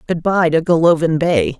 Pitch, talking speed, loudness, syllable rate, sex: 165 Hz, 190 wpm, -15 LUFS, 5.0 syllables/s, female